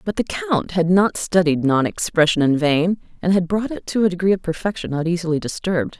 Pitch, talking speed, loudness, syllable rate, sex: 180 Hz, 220 wpm, -19 LUFS, 5.6 syllables/s, female